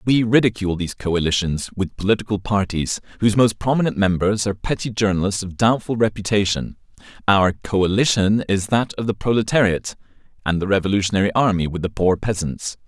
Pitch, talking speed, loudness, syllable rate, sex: 100 Hz, 150 wpm, -20 LUFS, 6.0 syllables/s, male